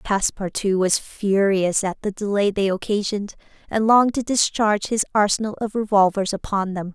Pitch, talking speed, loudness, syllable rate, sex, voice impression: 205 Hz, 155 wpm, -21 LUFS, 5.3 syllables/s, female, feminine, slightly adult-like, fluent, cute, friendly, slightly kind